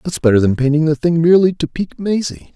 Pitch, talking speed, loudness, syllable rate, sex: 160 Hz, 235 wpm, -15 LUFS, 6.6 syllables/s, male